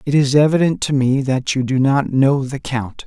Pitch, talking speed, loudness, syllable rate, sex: 135 Hz, 235 wpm, -17 LUFS, 4.8 syllables/s, male